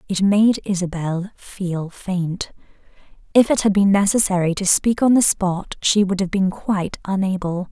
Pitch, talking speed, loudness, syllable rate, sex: 190 Hz, 165 wpm, -19 LUFS, 4.4 syllables/s, female